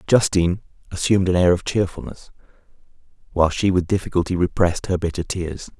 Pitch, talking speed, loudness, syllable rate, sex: 90 Hz, 145 wpm, -20 LUFS, 6.3 syllables/s, male